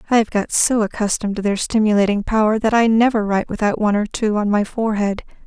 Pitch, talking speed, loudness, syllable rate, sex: 215 Hz, 220 wpm, -18 LUFS, 6.5 syllables/s, female